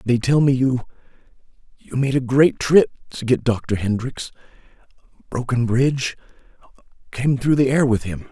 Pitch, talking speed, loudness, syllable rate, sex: 130 Hz, 130 wpm, -19 LUFS, 4.7 syllables/s, male